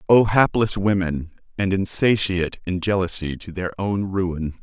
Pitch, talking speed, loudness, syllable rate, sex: 95 Hz, 145 wpm, -22 LUFS, 4.5 syllables/s, male